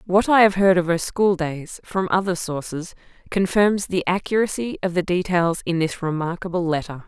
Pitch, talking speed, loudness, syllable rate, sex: 180 Hz, 180 wpm, -21 LUFS, 4.9 syllables/s, female